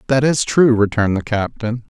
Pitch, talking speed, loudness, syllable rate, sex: 120 Hz, 185 wpm, -17 LUFS, 5.3 syllables/s, male